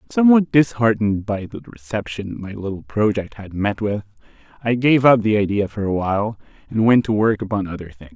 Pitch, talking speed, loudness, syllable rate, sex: 110 Hz, 185 wpm, -19 LUFS, 5.6 syllables/s, male